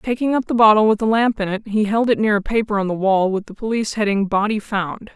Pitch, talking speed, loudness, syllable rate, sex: 210 Hz, 280 wpm, -18 LUFS, 6.1 syllables/s, female